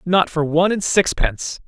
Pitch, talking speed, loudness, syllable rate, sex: 160 Hz, 180 wpm, -18 LUFS, 5.2 syllables/s, male